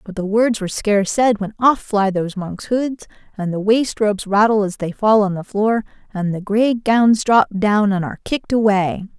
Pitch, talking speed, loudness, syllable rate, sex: 210 Hz, 215 wpm, -17 LUFS, 5.0 syllables/s, female